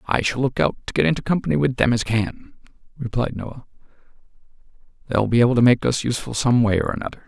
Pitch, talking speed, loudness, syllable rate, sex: 120 Hz, 205 wpm, -20 LUFS, 6.4 syllables/s, male